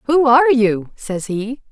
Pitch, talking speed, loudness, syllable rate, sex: 240 Hz, 175 wpm, -16 LUFS, 4.1 syllables/s, female